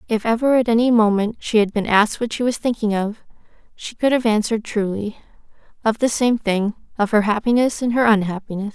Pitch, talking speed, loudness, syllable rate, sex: 220 Hz, 200 wpm, -19 LUFS, 5.9 syllables/s, female